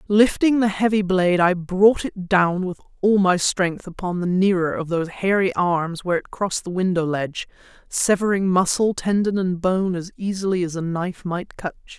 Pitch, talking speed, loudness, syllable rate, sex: 185 Hz, 190 wpm, -21 LUFS, 5.2 syllables/s, female